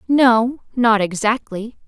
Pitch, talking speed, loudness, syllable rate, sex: 230 Hz, 95 wpm, -17 LUFS, 3.3 syllables/s, female